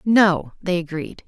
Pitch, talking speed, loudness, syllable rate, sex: 180 Hz, 140 wpm, -21 LUFS, 3.6 syllables/s, female